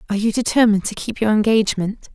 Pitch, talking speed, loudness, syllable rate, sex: 215 Hz, 195 wpm, -18 LUFS, 7.3 syllables/s, female